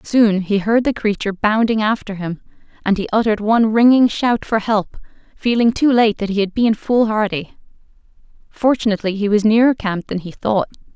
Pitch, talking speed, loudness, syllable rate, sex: 215 Hz, 180 wpm, -17 LUFS, 5.5 syllables/s, female